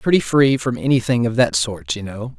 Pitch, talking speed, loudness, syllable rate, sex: 120 Hz, 250 wpm, -18 LUFS, 5.9 syllables/s, male